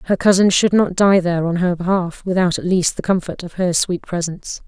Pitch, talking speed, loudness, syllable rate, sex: 180 Hz, 230 wpm, -17 LUFS, 5.6 syllables/s, female